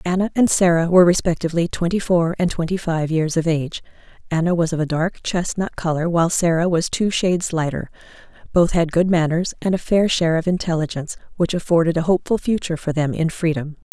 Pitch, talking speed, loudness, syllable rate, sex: 170 Hz, 195 wpm, -19 LUFS, 6.2 syllables/s, female